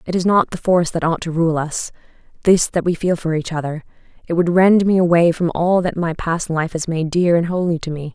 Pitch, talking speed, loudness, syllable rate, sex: 170 Hz, 250 wpm, -18 LUFS, 5.5 syllables/s, female